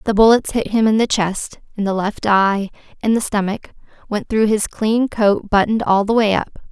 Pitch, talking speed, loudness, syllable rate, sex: 210 Hz, 215 wpm, -17 LUFS, 5.1 syllables/s, female